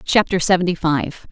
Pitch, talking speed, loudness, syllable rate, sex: 170 Hz, 135 wpm, -18 LUFS, 5.0 syllables/s, female